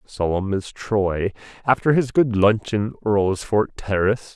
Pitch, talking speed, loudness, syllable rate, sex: 105 Hz, 140 wpm, -21 LUFS, 4.0 syllables/s, male